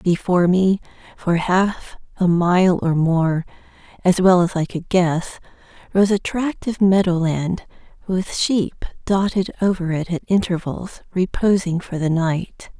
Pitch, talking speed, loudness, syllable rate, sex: 180 Hz, 145 wpm, -19 LUFS, 3.7 syllables/s, female